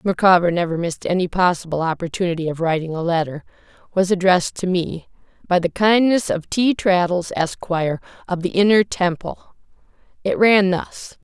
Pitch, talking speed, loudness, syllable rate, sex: 180 Hz, 150 wpm, -19 LUFS, 5.4 syllables/s, female